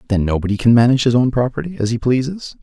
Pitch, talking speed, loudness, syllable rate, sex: 120 Hz, 230 wpm, -16 LUFS, 7.2 syllables/s, male